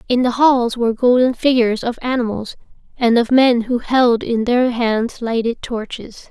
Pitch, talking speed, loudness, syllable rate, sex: 240 Hz, 170 wpm, -16 LUFS, 4.5 syllables/s, female